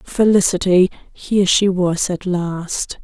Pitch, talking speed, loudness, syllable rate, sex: 185 Hz, 120 wpm, -17 LUFS, 3.7 syllables/s, female